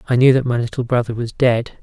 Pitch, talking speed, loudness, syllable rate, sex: 120 Hz, 265 wpm, -17 LUFS, 6.3 syllables/s, male